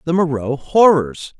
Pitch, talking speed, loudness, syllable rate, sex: 150 Hz, 130 wpm, -15 LUFS, 4.0 syllables/s, male